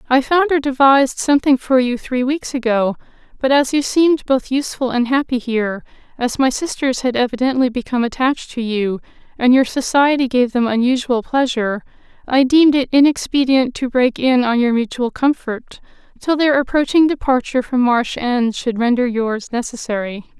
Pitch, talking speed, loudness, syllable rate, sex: 255 Hz, 160 wpm, -16 LUFS, 5.4 syllables/s, female